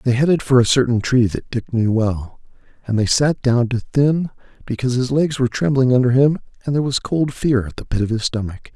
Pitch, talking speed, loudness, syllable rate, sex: 125 Hz, 235 wpm, -18 LUFS, 5.7 syllables/s, male